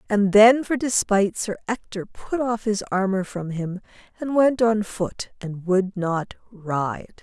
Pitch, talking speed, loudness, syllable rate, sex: 205 Hz, 165 wpm, -22 LUFS, 4.0 syllables/s, female